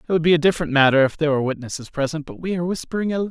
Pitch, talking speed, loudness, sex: 155 Hz, 290 wpm, -20 LUFS, male